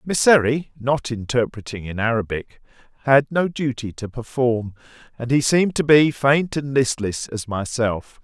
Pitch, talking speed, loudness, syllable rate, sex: 125 Hz, 145 wpm, -20 LUFS, 3.8 syllables/s, male